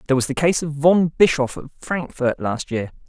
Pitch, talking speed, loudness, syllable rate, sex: 145 Hz, 215 wpm, -20 LUFS, 5.3 syllables/s, male